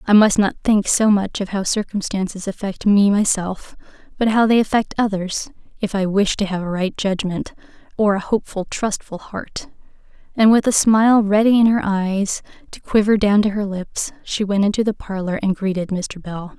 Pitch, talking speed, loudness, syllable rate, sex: 200 Hz, 190 wpm, -18 LUFS, 5.0 syllables/s, female